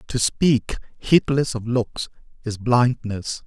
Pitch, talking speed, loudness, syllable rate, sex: 120 Hz, 120 wpm, -21 LUFS, 3.3 syllables/s, male